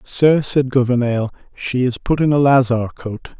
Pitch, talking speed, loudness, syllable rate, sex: 130 Hz, 175 wpm, -16 LUFS, 4.4 syllables/s, male